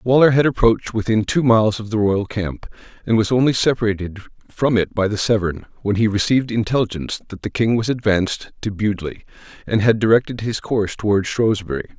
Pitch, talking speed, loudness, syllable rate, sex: 110 Hz, 185 wpm, -19 LUFS, 6.0 syllables/s, male